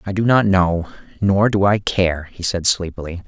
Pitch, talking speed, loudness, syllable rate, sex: 95 Hz, 185 wpm, -18 LUFS, 4.6 syllables/s, male